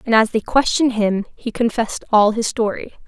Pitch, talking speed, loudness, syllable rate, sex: 225 Hz, 195 wpm, -18 LUFS, 5.5 syllables/s, female